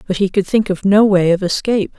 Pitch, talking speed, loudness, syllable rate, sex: 195 Hz, 270 wpm, -15 LUFS, 6.1 syllables/s, female